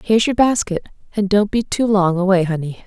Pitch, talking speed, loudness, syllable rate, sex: 200 Hz, 210 wpm, -17 LUFS, 5.6 syllables/s, female